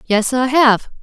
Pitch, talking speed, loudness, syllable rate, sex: 245 Hz, 175 wpm, -14 LUFS, 3.9 syllables/s, female